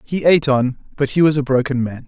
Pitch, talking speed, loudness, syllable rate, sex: 140 Hz, 260 wpm, -17 LUFS, 6.1 syllables/s, male